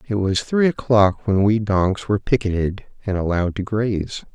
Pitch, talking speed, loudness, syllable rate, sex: 105 Hz, 180 wpm, -20 LUFS, 5.1 syllables/s, male